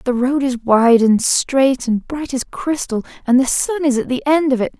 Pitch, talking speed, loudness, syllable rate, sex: 260 Hz, 240 wpm, -16 LUFS, 4.6 syllables/s, female